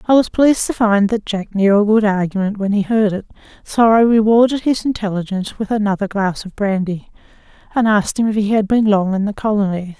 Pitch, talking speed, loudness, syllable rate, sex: 210 Hz, 215 wpm, -16 LUFS, 5.8 syllables/s, female